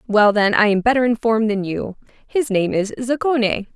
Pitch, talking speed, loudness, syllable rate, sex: 225 Hz, 190 wpm, -18 LUFS, 5.3 syllables/s, female